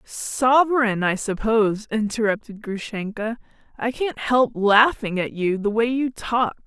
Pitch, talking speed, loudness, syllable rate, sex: 225 Hz, 135 wpm, -21 LUFS, 4.2 syllables/s, female